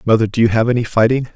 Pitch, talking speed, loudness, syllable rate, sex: 115 Hz, 265 wpm, -15 LUFS, 7.4 syllables/s, male